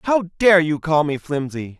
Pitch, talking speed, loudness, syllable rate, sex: 160 Hz, 200 wpm, -18 LUFS, 4.2 syllables/s, male